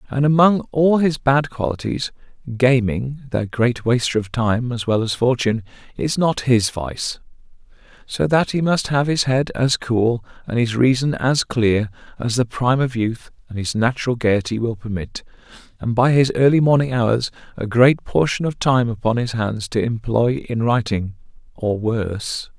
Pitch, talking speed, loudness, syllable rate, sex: 120 Hz, 175 wpm, -19 LUFS, 4.5 syllables/s, male